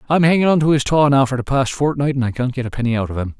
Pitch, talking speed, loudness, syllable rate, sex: 135 Hz, 355 wpm, -17 LUFS, 7.2 syllables/s, male